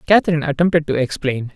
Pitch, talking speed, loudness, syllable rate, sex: 155 Hz, 155 wpm, -18 LUFS, 7.1 syllables/s, male